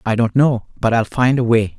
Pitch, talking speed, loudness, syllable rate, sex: 115 Hz, 270 wpm, -16 LUFS, 5.1 syllables/s, male